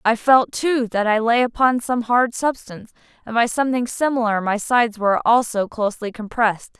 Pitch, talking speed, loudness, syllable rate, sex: 230 Hz, 175 wpm, -19 LUFS, 5.4 syllables/s, female